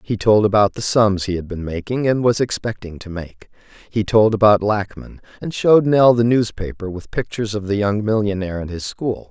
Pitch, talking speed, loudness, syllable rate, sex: 105 Hz, 205 wpm, -18 LUFS, 5.3 syllables/s, male